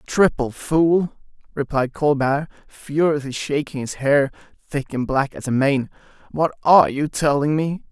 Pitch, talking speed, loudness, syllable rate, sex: 145 Hz, 145 wpm, -20 LUFS, 4.3 syllables/s, male